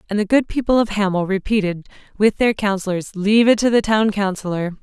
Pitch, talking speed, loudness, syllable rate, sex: 205 Hz, 200 wpm, -18 LUFS, 6.0 syllables/s, female